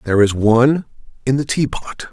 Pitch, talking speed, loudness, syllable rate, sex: 125 Hz, 200 wpm, -16 LUFS, 5.7 syllables/s, male